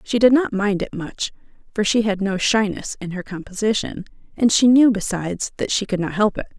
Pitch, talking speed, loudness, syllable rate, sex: 205 Hz, 220 wpm, -20 LUFS, 5.4 syllables/s, female